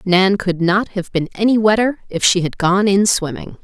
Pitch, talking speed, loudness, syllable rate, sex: 195 Hz, 215 wpm, -16 LUFS, 4.7 syllables/s, female